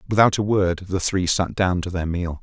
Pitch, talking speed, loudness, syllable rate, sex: 95 Hz, 250 wpm, -21 LUFS, 5.0 syllables/s, male